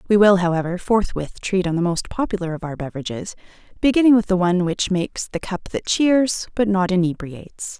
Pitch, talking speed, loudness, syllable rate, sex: 190 Hz, 190 wpm, -20 LUFS, 5.7 syllables/s, female